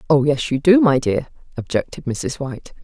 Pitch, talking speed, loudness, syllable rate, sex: 145 Hz, 190 wpm, -19 LUFS, 5.2 syllables/s, female